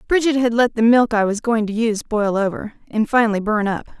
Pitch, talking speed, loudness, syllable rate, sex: 225 Hz, 240 wpm, -18 LUFS, 5.9 syllables/s, female